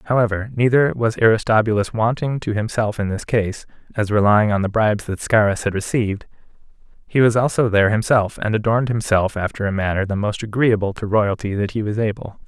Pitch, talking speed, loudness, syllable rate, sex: 110 Hz, 190 wpm, -19 LUFS, 5.8 syllables/s, male